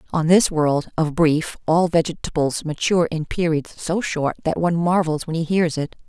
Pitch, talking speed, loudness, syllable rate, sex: 160 Hz, 190 wpm, -20 LUFS, 4.9 syllables/s, female